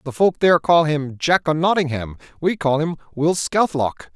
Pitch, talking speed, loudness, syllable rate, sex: 155 Hz, 190 wpm, -19 LUFS, 5.3 syllables/s, male